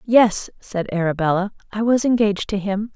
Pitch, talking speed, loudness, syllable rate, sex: 205 Hz, 165 wpm, -20 LUFS, 5.1 syllables/s, female